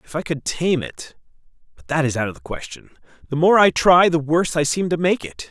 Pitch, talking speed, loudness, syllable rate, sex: 155 Hz, 240 wpm, -19 LUFS, 5.7 syllables/s, male